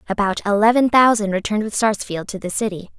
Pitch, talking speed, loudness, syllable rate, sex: 210 Hz, 180 wpm, -18 LUFS, 6.3 syllables/s, female